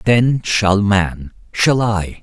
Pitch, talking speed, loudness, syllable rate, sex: 105 Hz, 110 wpm, -16 LUFS, 2.6 syllables/s, male